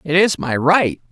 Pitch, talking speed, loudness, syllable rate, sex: 160 Hz, 215 wpm, -16 LUFS, 4.2 syllables/s, male